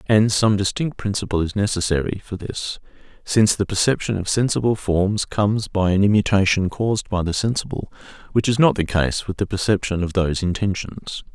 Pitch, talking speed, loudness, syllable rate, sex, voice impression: 100 Hz, 175 wpm, -20 LUFS, 5.5 syllables/s, male, masculine, adult-like, cool, slightly intellectual, sincere, slightly friendly, slightly sweet